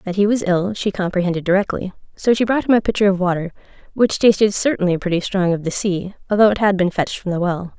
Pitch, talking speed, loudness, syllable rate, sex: 195 Hz, 240 wpm, -18 LUFS, 6.5 syllables/s, female